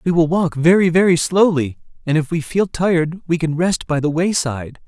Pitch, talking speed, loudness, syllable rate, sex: 165 Hz, 210 wpm, -17 LUFS, 5.2 syllables/s, male